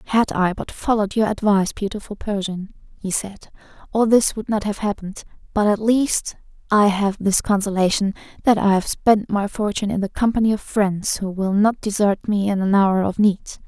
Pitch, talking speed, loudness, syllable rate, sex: 205 Hz, 195 wpm, -20 LUFS, 5.3 syllables/s, female